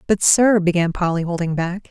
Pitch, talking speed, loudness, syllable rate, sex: 180 Hz, 190 wpm, -18 LUFS, 5.1 syllables/s, female